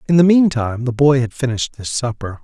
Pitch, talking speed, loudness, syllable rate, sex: 130 Hz, 220 wpm, -16 LUFS, 6.2 syllables/s, male